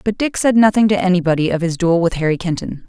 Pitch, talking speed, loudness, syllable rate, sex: 185 Hz, 250 wpm, -16 LUFS, 6.5 syllables/s, female